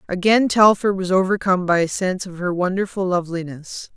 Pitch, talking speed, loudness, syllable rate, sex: 185 Hz, 165 wpm, -19 LUFS, 5.9 syllables/s, female